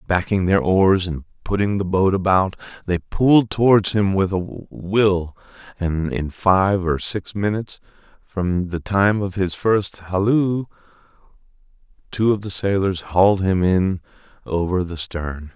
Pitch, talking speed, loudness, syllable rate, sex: 95 Hz, 145 wpm, -20 LUFS, 4.0 syllables/s, male